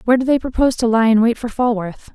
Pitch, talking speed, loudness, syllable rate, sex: 235 Hz, 280 wpm, -16 LUFS, 6.9 syllables/s, female